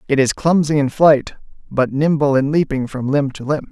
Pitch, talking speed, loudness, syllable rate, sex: 140 Hz, 210 wpm, -17 LUFS, 5.0 syllables/s, male